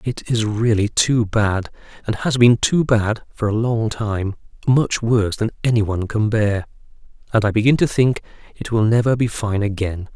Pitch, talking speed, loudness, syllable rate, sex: 110 Hz, 190 wpm, -19 LUFS, 4.8 syllables/s, male